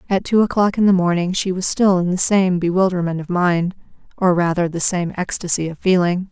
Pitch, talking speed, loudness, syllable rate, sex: 180 Hz, 210 wpm, -18 LUFS, 5.5 syllables/s, female